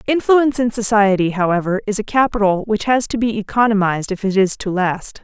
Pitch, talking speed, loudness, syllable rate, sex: 210 Hz, 195 wpm, -17 LUFS, 5.8 syllables/s, female